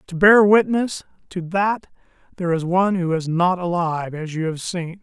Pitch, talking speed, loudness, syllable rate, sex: 180 Hz, 190 wpm, -19 LUFS, 5.0 syllables/s, male